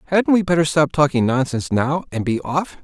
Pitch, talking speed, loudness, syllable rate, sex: 150 Hz, 210 wpm, -18 LUFS, 5.6 syllables/s, male